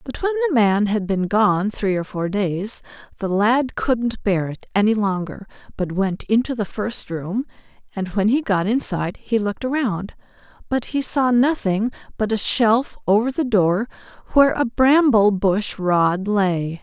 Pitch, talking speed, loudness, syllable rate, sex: 215 Hz, 170 wpm, -20 LUFS, 4.2 syllables/s, female